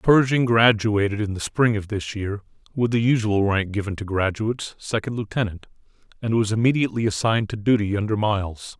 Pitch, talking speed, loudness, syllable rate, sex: 105 Hz, 170 wpm, -22 LUFS, 5.6 syllables/s, male